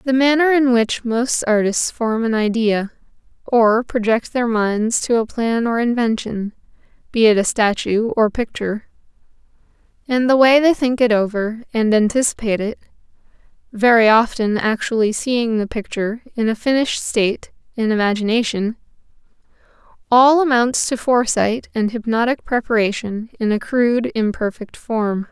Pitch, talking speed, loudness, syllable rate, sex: 230 Hz, 135 wpm, -17 LUFS, 4.8 syllables/s, female